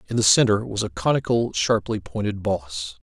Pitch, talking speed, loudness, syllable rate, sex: 100 Hz, 175 wpm, -22 LUFS, 5.0 syllables/s, male